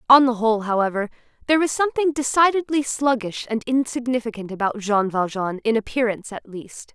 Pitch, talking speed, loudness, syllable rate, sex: 240 Hz, 155 wpm, -21 LUFS, 5.9 syllables/s, female